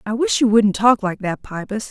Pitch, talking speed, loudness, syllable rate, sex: 220 Hz, 250 wpm, -18 LUFS, 5.0 syllables/s, female